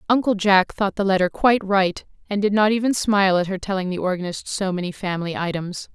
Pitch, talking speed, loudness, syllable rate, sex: 195 Hz, 210 wpm, -21 LUFS, 6.0 syllables/s, female